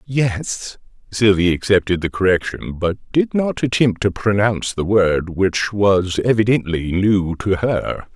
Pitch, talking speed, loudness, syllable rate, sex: 100 Hz, 140 wpm, -18 LUFS, 4.1 syllables/s, male